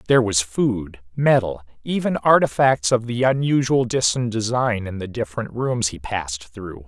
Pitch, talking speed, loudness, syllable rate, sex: 115 Hz, 155 wpm, -20 LUFS, 4.7 syllables/s, male